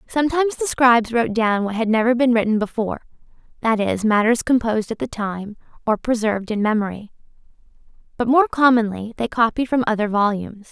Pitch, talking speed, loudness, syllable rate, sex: 230 Hz, 170 wpm, -19 LUFS, 6.0 syllables/s, female